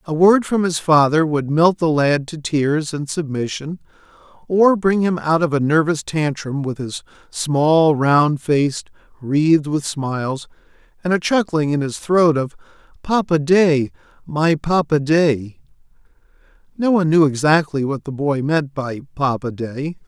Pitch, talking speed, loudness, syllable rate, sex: 155 Hz, 155 wpm, -18 LUFS, 4.1 syllables/s, male